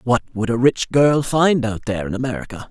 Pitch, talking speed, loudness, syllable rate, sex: 120 Hz, 220 wpm, -19 LUFS, 5.8 syllables/s, male